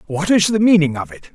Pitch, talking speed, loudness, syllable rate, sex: 170 Hz, 265 wpm, -15 LUFS, 5.9 syllables/s, male